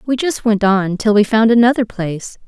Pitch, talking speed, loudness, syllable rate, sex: 220 Hz, 220 wpm, -14 LUFS, 5.3 syllables/s, female